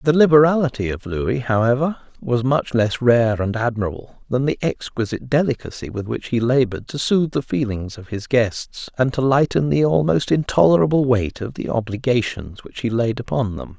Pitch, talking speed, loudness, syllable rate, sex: 125 Hz, 180 wpm, -20 LUFS, 5.4 syllables/s, male